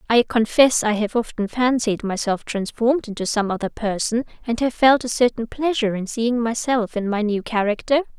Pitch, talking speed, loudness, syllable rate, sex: 230 Hz, 185 wpm, -20 LUFS, 5.3 syllables/s, female